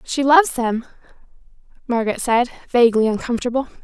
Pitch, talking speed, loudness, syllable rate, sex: 245 Hz, 110 wpm, -18 LUFS, 6.6 syllables/s, female